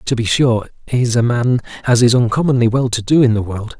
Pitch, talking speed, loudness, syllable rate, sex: 120 Hz, 235 wpm, -15 LUFS, 5.6 syllables/s, male